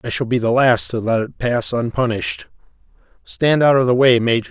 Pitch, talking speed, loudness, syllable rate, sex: 120 Hz, 215 wpm, -17 LUFS, 5.5 syllables/s, male